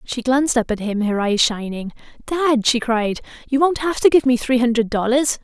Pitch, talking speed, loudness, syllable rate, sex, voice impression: 245 Hz, 220 wpm, -18 LUFS, 5.1 syllables/s, female, feminine, adult-like, slightly relaxed, powerful, slightly hard, raspy, intellectual, calm, lively, sharp